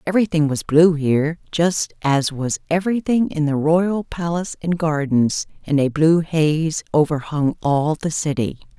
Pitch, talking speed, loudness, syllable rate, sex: 155 Hz, 150 wpm, -19 LUFS, 4.5 syllables/s, female